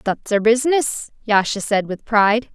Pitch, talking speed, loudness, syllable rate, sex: 220 Hz, 165 wpm, -18 LUFS, 4.7 syllables/s, female